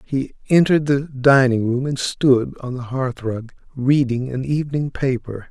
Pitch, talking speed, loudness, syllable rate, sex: 130 Hz, 155 wpm, -19 LUFS, 4.4 syllables/s, male